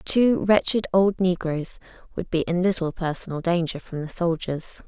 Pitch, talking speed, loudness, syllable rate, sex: 180 Hz, 160 wpm, -24 LUFS, 4.6 syllables/s, female